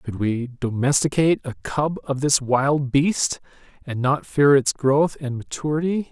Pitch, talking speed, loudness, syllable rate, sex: 140 Hz, 155 wpm, -21 LUFS, 4.2 syllables/s, male